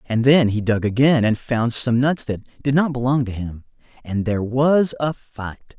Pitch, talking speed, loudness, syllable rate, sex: 125 Hz, 205 wpm, -19 LUFS, 4.6 syllables/s, male